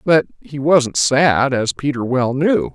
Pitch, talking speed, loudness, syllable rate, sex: 140 Hz, 175 wpm, -16 LUFS, 3.6 syllables/s, male